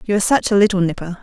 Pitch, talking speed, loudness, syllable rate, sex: 195 Hz, 295 wpm, -16 LUFS, 8.0 syllables/s, female